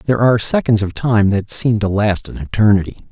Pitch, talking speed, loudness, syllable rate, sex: 110 Hz, 210 wpm, -16 LUFS, 5.8 syllables/s, male